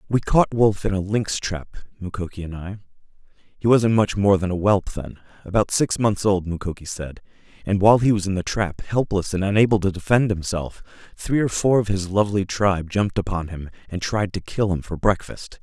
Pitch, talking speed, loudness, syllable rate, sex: 100 Hz, 205 wpm, -21 LUFS, 5.4 syllables/s, male